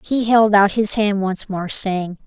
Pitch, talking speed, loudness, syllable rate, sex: 205 Hz, 210 wpm, -17 LUFS, 3.8 syllables/s, female